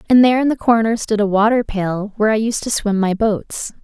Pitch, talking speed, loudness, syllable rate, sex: 215 Hz, 235 wpm, -17 LUFS, 5.7 syllables/s, female